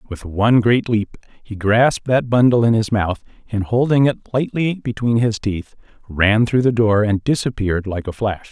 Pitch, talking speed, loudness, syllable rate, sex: 110 Hz, 190 wpm, -17 LUFS, 4.9 syllables/s, male